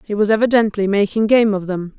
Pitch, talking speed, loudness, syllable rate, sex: 210 Hz, 210 wpm, -16 LUFS, 6.0 syllables/s, female